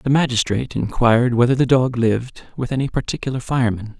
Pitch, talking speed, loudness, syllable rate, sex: 125 Hz, 165 wpm, -19 LUFS, 6.2 syllables/s, male